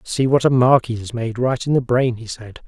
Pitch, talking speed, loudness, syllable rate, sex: 120 Hz, 290 wpm, -18 LUFS, 5.1 syllables/s, male